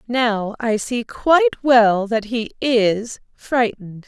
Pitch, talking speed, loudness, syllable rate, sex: 235 Hz, 135 wpm, -18 LUFS, 3.5 syllables/s, female